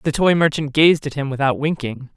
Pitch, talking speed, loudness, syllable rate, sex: 145 Hz, 220 wpm, -18 LUFS, 5.5 syllables/s, female